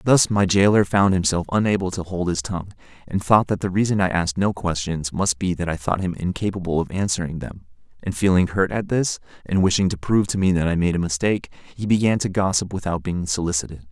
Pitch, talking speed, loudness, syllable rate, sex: 90 Hz, 225 wpm, -21 LUFS, 6.0 syllables/s, male